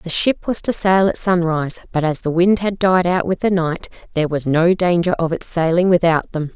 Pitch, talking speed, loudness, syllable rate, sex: 175 Hz, 240 wpm, -17 LUFS, 5.3 syllables/s, female